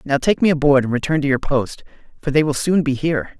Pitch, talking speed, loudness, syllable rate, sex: 145 Hz, 265 wpm, -18 LUFS, 6.2 syllables/s, male